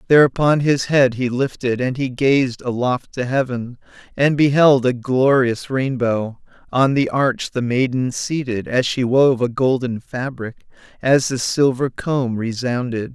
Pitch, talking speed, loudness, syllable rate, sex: 130 Hz, 150 wpm, -18 LUFS, 4.1 syllables/s, male